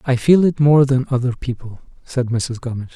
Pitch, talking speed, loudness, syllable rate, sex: 130 Hz, 205 wpm, -17 LUFS, 5.7 syllables/s, male